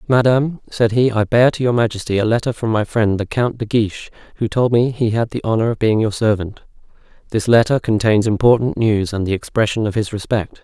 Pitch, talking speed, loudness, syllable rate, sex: 110 Hz, 220 wpm, -17 LUFS, 5.8 syllables/s, male